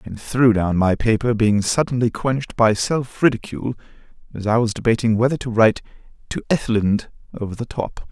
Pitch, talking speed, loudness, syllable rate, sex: 115 Hz, 170 wpm, -19 LUFS, 5.6 syllables/s, male